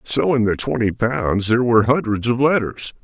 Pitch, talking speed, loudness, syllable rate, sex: 120 Hz, 195 wpm, -18 LUFS, 5.2 syllables/s, male